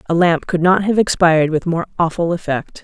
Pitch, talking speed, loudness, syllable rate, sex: 170 Hz, 210 wpm, -16 LUFS, 5.6 syllables/s, female